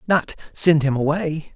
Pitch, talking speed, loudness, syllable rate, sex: 155 Hz, 115 wpm, -19 LUFS, 4.1 syllables/s, male